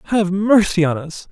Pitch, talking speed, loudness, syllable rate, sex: 190 Hz, 185 wpm, -16 LUFS, 4.7 syllables/s, male